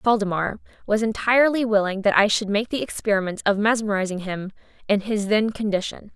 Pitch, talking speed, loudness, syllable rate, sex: 210 Hz, 165 wpm, -22 LUFS, 5.7 syllables/s, female